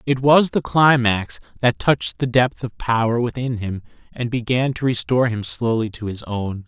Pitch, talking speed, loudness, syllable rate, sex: 120 Hz, 190 wpm, -20 LUFS, 4.8 syllables/s, male